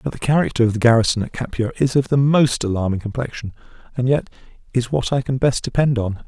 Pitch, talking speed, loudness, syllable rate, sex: 125 Hz, 220 wpm, -19 LUFS, 6.3 syllables/s, male